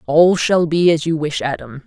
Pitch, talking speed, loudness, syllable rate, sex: 160 Hz, 225 wpm, -16 LUFS, 4.7 syllables/s, female